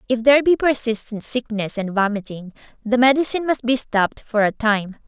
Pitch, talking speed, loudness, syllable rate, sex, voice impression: 235 Hz, 175 wpm, -19 LUFS, 5.5 syllables/s, female, very feminine, very young, very thin, tensed, slightly powerful, very bright, soft, very clear, fluent, very cute, intellectual, very refreshing, sincere, calm, very friendly, very reassuring, unique, very elegant, slightly wild, very sweet, lively, very kind, slightly intense, slightly sharp, light